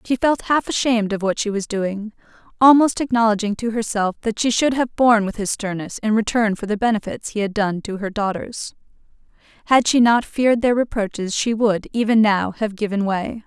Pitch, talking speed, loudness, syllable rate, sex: 220 Hz, 200 wpm, -19 LUFS, 5.3 syllables/s, female